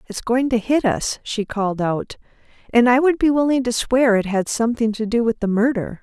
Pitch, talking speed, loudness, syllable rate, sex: 235 Hz, 230 wpm, -19 LUFS, 5.3 syllables/s, female